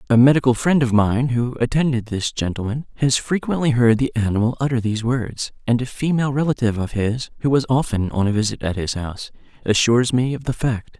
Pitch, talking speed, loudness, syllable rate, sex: 120 Hz, 200 wpm, -20 LUFS, 5.9 syllables/s, male